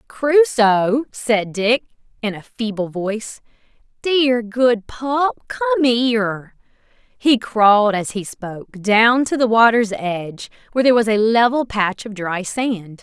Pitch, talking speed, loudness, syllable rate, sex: 225 Hz, 145 wpm, -18 LUFS, 3.9 syllables/s, female